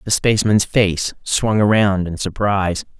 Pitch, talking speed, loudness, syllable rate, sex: 100 Hz, 140 wpm, -17 LUFS, 4.5 syllables/s, male